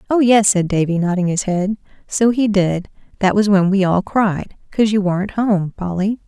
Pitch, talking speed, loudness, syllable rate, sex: 195 Hz, 200 wpm, -17 LUFS, 4.9 syllables/s, female